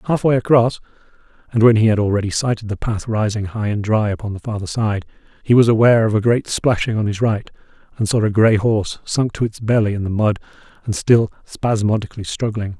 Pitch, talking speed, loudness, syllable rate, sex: 110 Hz, 205 wpm, -18 LUFS, 5.9 syllables/s, male